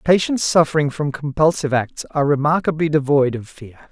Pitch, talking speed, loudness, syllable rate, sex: 145 Hz, 155 wpm, -18 LUFS, 5.5 syllables/s, male